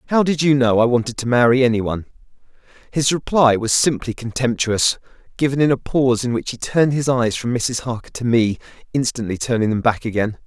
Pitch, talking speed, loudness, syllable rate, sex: 120 Hz, 200 wpm, -18 LUFS, 5.9 syllables/s, male